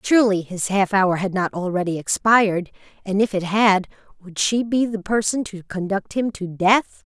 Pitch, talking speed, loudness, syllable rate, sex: 200 Hz, 185 wpm, -20 LUFS, 4.8 syllables/s, female